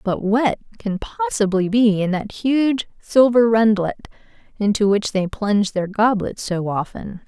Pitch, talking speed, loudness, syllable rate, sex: 205 Hz, 150 wpm, -19 LUFS, 4.2 syllables/s, female